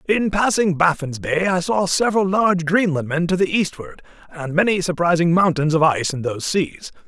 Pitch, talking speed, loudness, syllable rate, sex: 175 Hz, 180 wpm, -19 LUFS, 5.4 syllables/s, male